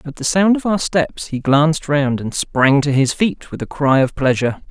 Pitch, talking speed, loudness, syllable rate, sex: 145 Hz, 245 wpm, -16 LUFS, 4.8 syllables/s, male